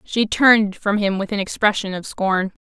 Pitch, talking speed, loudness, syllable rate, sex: 205 Hz, 205 wpm, -18 LUFS, 4.9 syllables/s, female